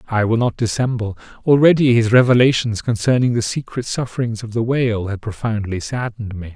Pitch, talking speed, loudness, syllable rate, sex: 115 Hz, 165 wpm, -18 LUFS, 5.7 syllables/s, male